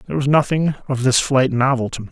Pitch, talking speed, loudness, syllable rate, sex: 130 Hz, 255 wpm, -18 LUFS, 6.6 syllables/s, male